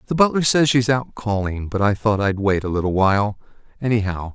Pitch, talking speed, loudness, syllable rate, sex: 110 Hz, 205 wpm, -19 LUFS, 5.7 syllables/s, male